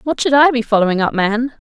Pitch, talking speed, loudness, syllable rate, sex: 240 Hz, 250 wpm, -15 LUFS, 6.0 syllables/s, female